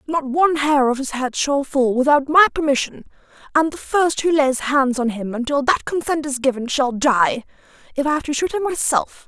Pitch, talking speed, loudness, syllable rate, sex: 280 Hz, 215 wpm, -19 LUFS, 5.1 syllables/s, female